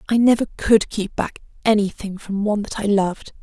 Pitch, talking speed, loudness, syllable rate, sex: 205 Hz, 195 wpm, -20 LUFS, 5.4 syllables/s, female